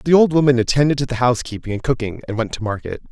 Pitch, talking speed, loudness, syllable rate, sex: 125 Hz, 250 wpm, -18 LUFS, 7.5 syllables/s, male